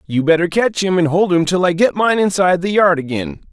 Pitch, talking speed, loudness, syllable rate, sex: 175 Hz, 255 wpm, -15 LUFS, 5.7 syllables/s, male